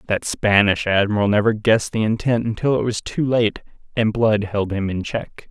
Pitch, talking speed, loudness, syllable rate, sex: 110 Hz, 195 wpm, -19 LUFS, 5.0 syllables/s, male